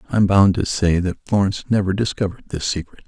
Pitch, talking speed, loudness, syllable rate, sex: 95 Hz, 215 wpm, -19 LUFS, 6.7 syllables/s, male